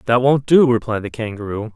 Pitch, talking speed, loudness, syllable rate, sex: 120 Hz, 205 wpm, -17 LUFS, 5.7 syllables/s, male